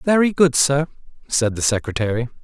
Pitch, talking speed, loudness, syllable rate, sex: 135 Hz, 150 wpm, -19 LUFS, 5.5 syllables/s, male